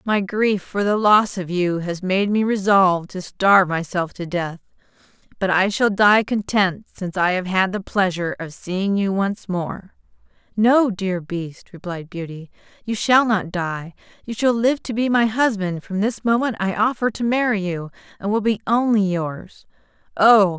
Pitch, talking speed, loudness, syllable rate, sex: 200 Hz, 180 wpm, -20 LUFS, 4.4 syllables/s, female